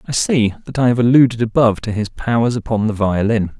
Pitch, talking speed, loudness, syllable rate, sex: 115 Hz, 215 wpm, -16 LUFS, 6.0 syllables/s, male